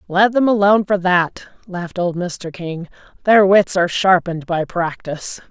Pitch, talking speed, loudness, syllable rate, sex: 185 Hz, 165 wpm, -17 LUFS, 4.8 syllables/s, female